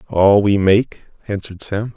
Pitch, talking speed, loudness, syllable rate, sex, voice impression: 100 Hz, 155 wpm, -16 LUFS, 4.4 syllables/s, male, masculine, middle-aged, thick, tensed, powerful, slightly hard, muffled, cool, intellectual, mature, wild, lively, slightly strict